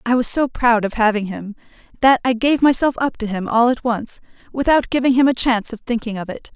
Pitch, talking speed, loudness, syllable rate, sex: 240 Hz, 240 wpm, -17 LUFS, 5.7 syllables/s, female